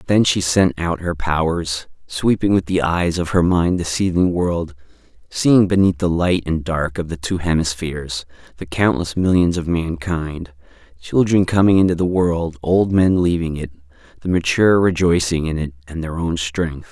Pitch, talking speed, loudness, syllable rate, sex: 85 Hz, 170 wpm, -18 LUFS, 4.6 syllables/s, male